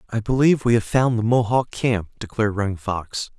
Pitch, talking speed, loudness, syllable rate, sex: 110 Hz, 195 wpm, -21 LUFS, 5.6 syllables/s, male